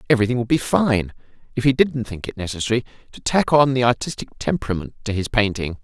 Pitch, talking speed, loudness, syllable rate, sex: 115 Hz, 195 wpm, -21 LUFS, 6.5 syllables/s, male